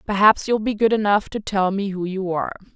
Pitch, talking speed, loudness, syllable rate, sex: 200 Hz, 240 wpm, -20 LUFS, 5.8 syllables/s, female